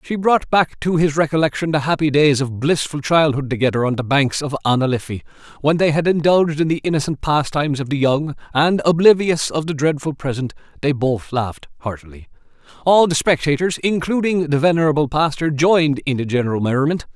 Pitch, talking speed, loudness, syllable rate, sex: 150 Hz, 180 wpm, -18 LUFS, 5.8 syllables/s, male